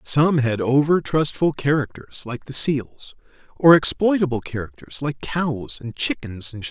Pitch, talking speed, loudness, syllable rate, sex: 140 Hz, 150 wpm, -21 LUFS, 4.4 syllables/s, male